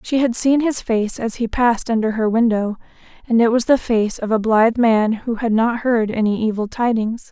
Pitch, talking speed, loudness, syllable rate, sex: 225 Hz, 220 wpm, -18 LUFS, 5.1 syllables/s, female